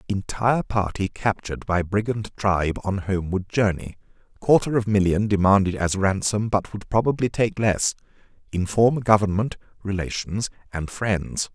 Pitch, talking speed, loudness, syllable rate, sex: 100 Hz, 130 wpm, -23 LUFS, 4.8 syllables/s, male